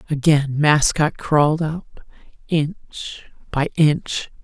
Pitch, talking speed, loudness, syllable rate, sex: 150 Hz, 95 wpm, -19 LUFS, 2.9 syllables/s, female